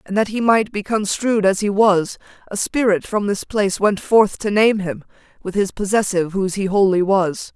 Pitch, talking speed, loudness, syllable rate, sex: 200 Hz, 205 wpm, -18 LUFS, 5.0 syllables/s, female